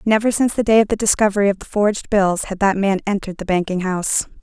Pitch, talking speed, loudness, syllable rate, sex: 200 Hz, 245 wpm, -18 LUFS, 6.7 syllables/s, female